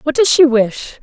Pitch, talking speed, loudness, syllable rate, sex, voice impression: 270 Hz, 235 wpm, -12 LUFS, 4.3 syllables/s, female, very feminine, young, thin, tensed, slightly powerful, slightly bright, soft, very clear, fluent, slightly raspy, very cute, slightly cool, very intellectual, very refreshing, sincere, calm, very friendly, very reassuring, very unique, very elegant, wild, very sweet, very lively, kind, intense, slightly sharp, light